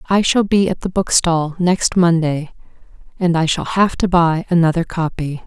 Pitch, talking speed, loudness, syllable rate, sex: 170 Hz, 175 wpm, -16 LUFS, 4.5 syllables/s, female